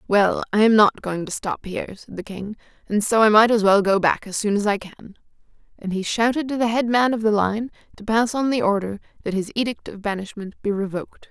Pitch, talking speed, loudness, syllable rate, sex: 210 Hz, 245 wpm, -21 LUFS, 5.6 syllables/s, female